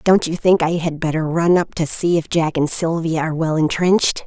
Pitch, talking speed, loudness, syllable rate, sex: 165 Hz, 240 wpm, -18 LUFS, 5.3 syllables/s, female